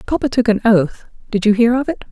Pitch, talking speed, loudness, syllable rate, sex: 230 Hz, 225 wpm, -16 LUFS, 6.0 syllables/s, female